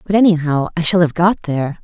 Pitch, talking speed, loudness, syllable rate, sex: 170 Hz, 230 wpm, -15 LUFS, 6.0 syllables/s, female